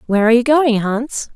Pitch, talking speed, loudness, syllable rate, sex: 240 Hz, 220 wpm, -15 LUFS, 6.0 syllables/s, female